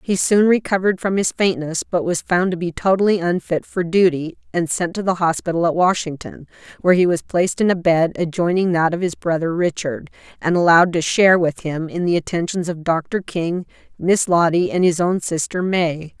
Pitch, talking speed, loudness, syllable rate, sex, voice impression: 175 Hz, 200 wpm, -18 LUFS, 5.3 syllables/s, female, feminine, slightly middle-aged, tensed, clear, halting, calm, friendly, slightly unique, lively, modest